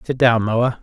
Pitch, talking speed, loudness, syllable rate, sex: 120 Hz, 220 wpm, -17 LUFS, 4.4 syllables/s, male